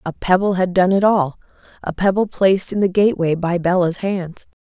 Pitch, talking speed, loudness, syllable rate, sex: 185 Hz, 180 wpm, -17 LUFS, 5.3 syllables/s, female